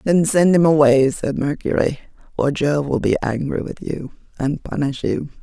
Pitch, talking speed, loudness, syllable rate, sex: 145 Hz, 175 wpm, -19 LUFS, 4.7 syllables/s, female